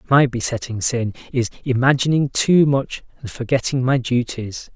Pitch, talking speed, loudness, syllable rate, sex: 125 Hz, 140 wpm, -19 LUFS, 4.7 syllables/s, male